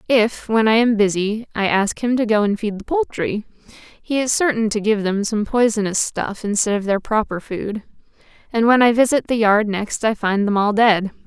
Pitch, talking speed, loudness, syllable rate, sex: 215 Hz, 215 wpm, -18 LUFS, 4.9 syllables/s, female